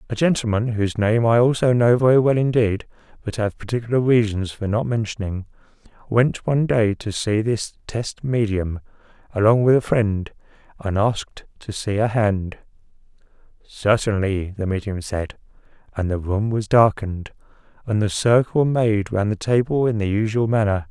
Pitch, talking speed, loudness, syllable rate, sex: 110 Hz, 160 wpm, -20 LUFS, 4.9 syllables/s, male